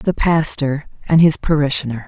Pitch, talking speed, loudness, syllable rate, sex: 150 Hz, 145 wpm, -17 LUFS, 4.9 syllables/s, female